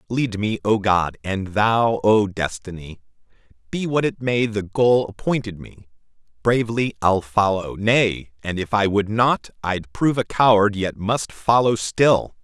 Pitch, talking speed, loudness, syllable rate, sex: 105 Hz, 160 wpm, -20 LUFS, 4.1 syllables/s, male